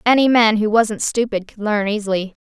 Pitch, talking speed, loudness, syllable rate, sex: 215 Hz, 195 wpm, -17 LUFS, 5.3 syllables/s, female